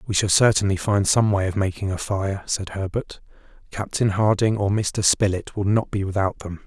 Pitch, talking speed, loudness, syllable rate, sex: 100 Hz, 200 wpm, -22 LUFS, 5.0 syllables/s, male